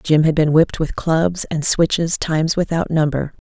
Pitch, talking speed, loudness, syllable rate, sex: 160 Hz, 190 wpm, -18 LUFS, 4.8 syllables/s, female